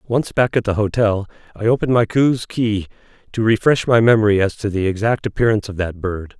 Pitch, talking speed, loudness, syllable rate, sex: 110 Hz, 205 wpm, -18 LUFS, 5.8 syllables/s, male